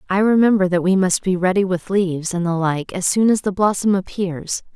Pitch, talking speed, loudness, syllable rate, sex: 185 Hz, 225 wpm, -18 LUFS, 5.4 syllables/s, female